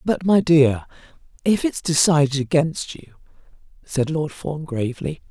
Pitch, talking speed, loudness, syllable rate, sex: 155 Hz, 135 wpm, -20 LUFS, 4.5 syllables/s, female